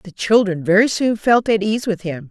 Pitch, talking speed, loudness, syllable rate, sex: 200 Hz, 235 wpm, -17 LUFS, 5.0 syllables/s, female